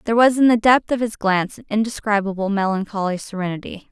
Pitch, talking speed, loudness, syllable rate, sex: 210 Hz, 185 wpm, -19 LUFS, 6.4 syllables/s, female